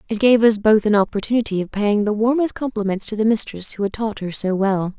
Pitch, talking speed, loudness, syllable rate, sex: 215 Hz, 240 wpm, -19 LUFS, 5.9 syllables/s, female